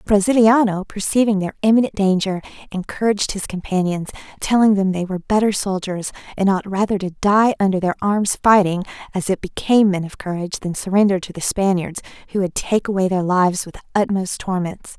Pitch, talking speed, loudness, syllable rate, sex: 195 Hz, 175 wpm, -19 LUFS, 5.8 syllables/s, female